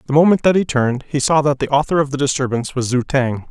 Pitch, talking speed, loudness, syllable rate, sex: 140 Hz, 275 wpm, -17 LUFS, 6.7 syllables/s, male